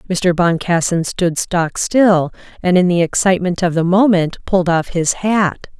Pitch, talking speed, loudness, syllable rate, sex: 180 Hz, 165 wpm, -15 LUFS, 4.5 syllables/s, female